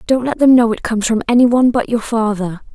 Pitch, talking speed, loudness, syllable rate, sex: 230 Hz, 260 wpm, -14 LUFS, 6.5 syllables/s, female